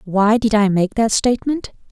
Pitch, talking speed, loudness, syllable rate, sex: 215 Hz, 190 wpm, -17 LUFS, 4.9 syllables/s, female